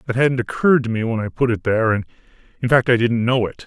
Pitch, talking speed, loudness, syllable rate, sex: 120 Hz, 280 wpm, -18 LUFS, 6.8 syllables/s, male